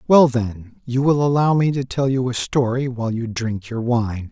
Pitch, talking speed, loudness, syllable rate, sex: 125 Hz, 225 wpm, -20 LUFS, 4.7 syllables/s, male